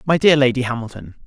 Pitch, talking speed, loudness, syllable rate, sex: 130 Hz, 190 wpm, -17 LUFS, 6.5 syllables/s, male